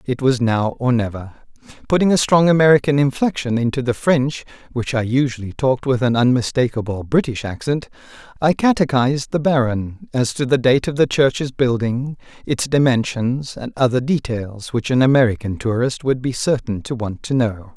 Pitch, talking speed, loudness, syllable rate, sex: 125 Hz, 170 wpm, -18 LUFS, 5.1 syllables/s, male